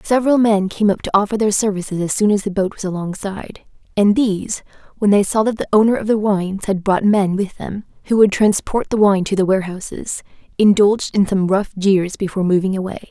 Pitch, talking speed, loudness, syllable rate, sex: 200 Hz, 215 wpm, -17 LUFS, 5.8 syllables/s, female